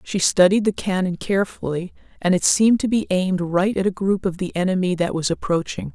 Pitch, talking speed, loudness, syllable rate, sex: 185 Hz, 210 wpm, -20 LUFS, 5.8 syllables/s, female